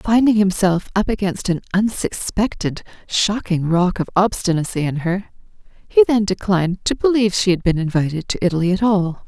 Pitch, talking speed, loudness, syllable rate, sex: 190 Hz, 160 wpm, -18 LUFS, 5.2 syllables/s, female